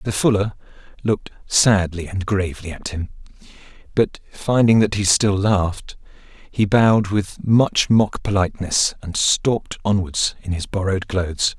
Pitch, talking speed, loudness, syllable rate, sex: 100 Hz, 140 wpm, -19 LUFS, 4.6 syllables/s, male